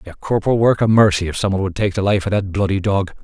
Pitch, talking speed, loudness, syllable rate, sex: 100 Hz, 295 wpm, -17 LUFS, 7.1 syllables/s, male